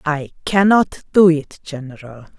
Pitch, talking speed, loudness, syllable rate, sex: 160 Hz, 125 wpm, -15 LUFS, 4.1 syllables/s, female